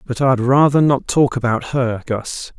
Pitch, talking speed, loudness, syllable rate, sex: 130 Hz, 185 wpm, -16 LUFS, 4.1 syllables/s, male